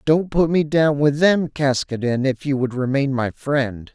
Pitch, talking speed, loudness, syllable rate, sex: 140 Hz, 200 wpm, -19 LUFS, 4.2 syllables/s, male